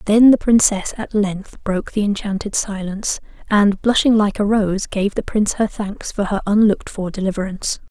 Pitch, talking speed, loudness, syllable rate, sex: 205 Hz, 180 wpm, -18 LUFS, 5.2 syllables/s, female